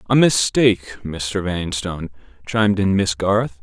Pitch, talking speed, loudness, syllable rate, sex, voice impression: 95 Hz, 130 wpm, -19 LUFS, 4.3 syllables/s, male, masculine, adult-like, thick, tensed, powerful, slightly muffled, cool, intellectual, calm, mature, wild, lively, slightly strict